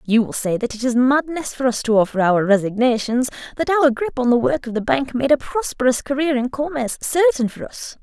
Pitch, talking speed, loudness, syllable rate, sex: 255 Hz, 230 wpm, -19 LUFS, 5.5 syllables/s, female